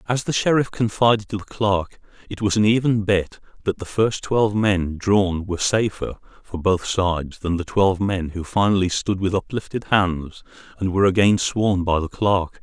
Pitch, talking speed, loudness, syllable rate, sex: 100 Hz, 190 wpm, -21 LUFS, 4.8 syllables/s, male